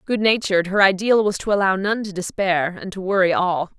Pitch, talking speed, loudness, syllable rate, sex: 190 Hz, 205 wpm, -19 LUFS, 5.5 syllables/s, female